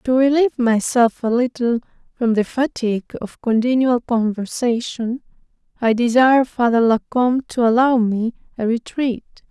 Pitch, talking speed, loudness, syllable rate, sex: 240 Hz, 135 wpm, -18 LUFS, 4.8 syllables/s, female